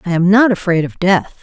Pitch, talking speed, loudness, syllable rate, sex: 185 Hz, 255 wpm, -13 LUFS, 5.5 syllables/s, female